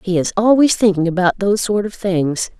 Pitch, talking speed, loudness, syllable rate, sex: 195 Hz, 210 wpm, -16 LUFS, 5.6 syllables/s, female